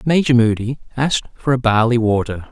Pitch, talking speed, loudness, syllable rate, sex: 120 Hz, 145 wpm, -17 LUFS, 5.1 syllables/s, male